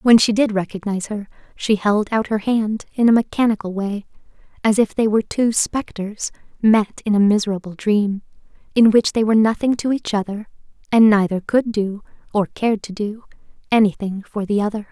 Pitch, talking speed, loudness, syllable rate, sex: 210 Hz, 180 wpm, -19 LUFS, 5.4 syllables/s, female